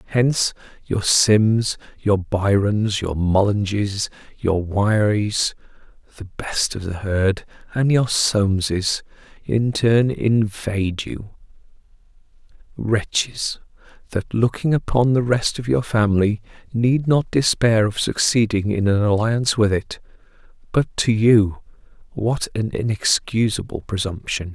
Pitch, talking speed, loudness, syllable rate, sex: 105 Hz, 110 wpm, -20 LUFS, 3.7 syllables/s, male